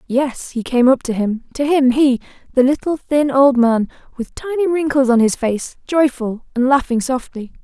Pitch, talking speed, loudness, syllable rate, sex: 265 Hz, 190 wpm, -17 LUFS, 4.6 syllables/s, female